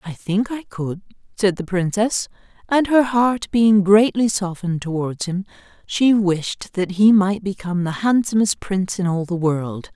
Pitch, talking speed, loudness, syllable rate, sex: 195 Hz, 170 wpm, -19 LUFS, 4.4 syllables/s, female